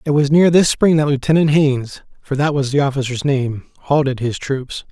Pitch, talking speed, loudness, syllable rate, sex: 140 Hz, 205 wpm, -16 LUFS, 5.3 syllables/s, male